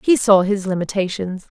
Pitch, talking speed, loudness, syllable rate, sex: 195 Hz, 150 wpm, -18 LUFS, 5.0 syllables/s, female